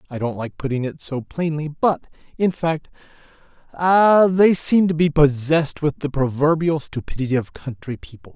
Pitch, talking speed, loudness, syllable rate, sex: 150 Hz, 165 wpm, -19 LUFS, 4.9 syllables/s, male